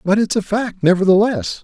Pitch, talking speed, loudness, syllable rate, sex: 200 Hz, 185 wpm, -16 LUFS, 5.2 syllables/s, male